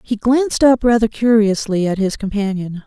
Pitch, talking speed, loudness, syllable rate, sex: 215 Hz, 170 wpm, -16 LUFS, 5.1 syllables/s, female